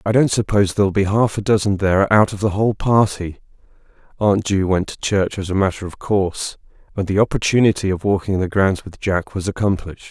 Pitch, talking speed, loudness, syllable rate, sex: 100 Hz, 215 wpm, -18 LUFS, 6.1 syllables/s, male